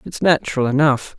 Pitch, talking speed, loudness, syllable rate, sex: 140 Hz, 150 wpm, -17 LUFS, 5.6 syllables/s, male